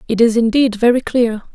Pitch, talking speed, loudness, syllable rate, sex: 230 Hz, 195 wpm, -15 LUFS, 5.4 syllables/s, female